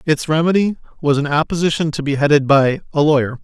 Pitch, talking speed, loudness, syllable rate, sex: 150 Hz, 190 wpm, -16 LUFS, 6.1 syllables/s, male